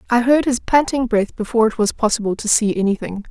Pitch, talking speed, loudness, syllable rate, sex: 225 Hz, 220 wpm, -18 LUFS, 6.2 syllables/s, female